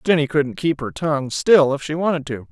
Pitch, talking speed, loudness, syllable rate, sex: 150 Hz, 240 wpm, -19 LUFS, 5.4 syllables/s, male